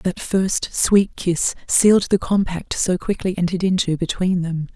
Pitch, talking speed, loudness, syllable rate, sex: 180 Hz, 165 wpm, -19 LUFS, 4.4 syllables/s, female